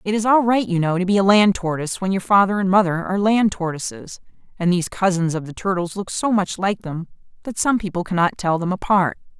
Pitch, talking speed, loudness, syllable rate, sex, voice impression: 190 Hz, 235 wpm, -19 LUFS, 6.0 syllables/s, female, feminine, adult-like, tensed, powerful, clear, fluent, intellectual, unique, lively, intense